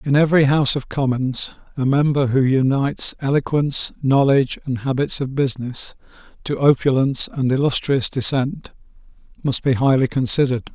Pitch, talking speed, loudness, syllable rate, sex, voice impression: 135 Hz, 135 wpm, -19 LUFS, 5.5 syllables/s, male, masculine, adult-like, tensed, slightly weak, soft, raspy, calm, friendly, reassuring, slightly unique, kind, modest